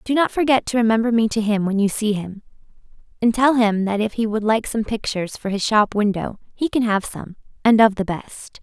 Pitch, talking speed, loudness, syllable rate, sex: 220 Hz, 230 wpm, -19 LUFS, 5.5 syllables/s, female